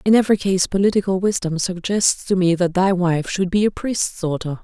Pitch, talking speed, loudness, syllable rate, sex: 185 Hz, 205 wpm, -19 LUFS, 5.3 syllables/s, female